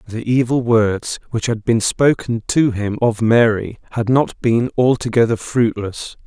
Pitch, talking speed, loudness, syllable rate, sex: 115 Hz, 155 wpm, -17 LUFS, 4.1 syllables/s, male